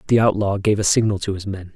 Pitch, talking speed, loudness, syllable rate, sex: 100 Hz, 275 wpm, -19 LUFS, 6.5 syllables/s, male